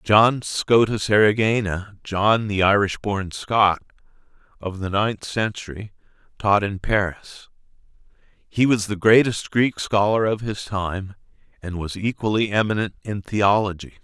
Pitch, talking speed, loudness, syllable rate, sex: 105 Hz, 130 wpm, -21 LUFS, 3.9 syllables/s, male